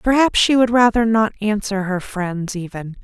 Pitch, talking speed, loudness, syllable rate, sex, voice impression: 210 Hz, 180 wpm, -17 LUFS, 4.6 syllables/s, female, very feminine, very adult-like, slightly thin, slightly tensed, powerful, bright, slightly soft, clear, fluent, cute, slightly cool, intellectual, refreshing, sincere, calm, very friendly, slightly reassuring, slightly unique, elegant, slightly wild, sweet, slightly lively, kind, slightly modest, slightly light